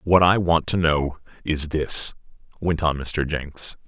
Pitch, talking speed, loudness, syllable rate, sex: 80 Hz, 170 wpm, -22 LUFS, 3.7 syllables/s, male